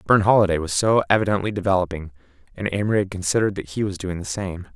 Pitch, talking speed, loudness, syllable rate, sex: 95 Hz, 190 wpm, -21 LUFS, 7.3 syllables/s, male